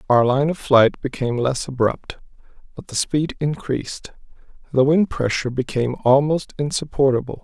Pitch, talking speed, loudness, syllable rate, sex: 135 Hz, 135 wpm, -20 LUFS, 5.2 syllables/s, male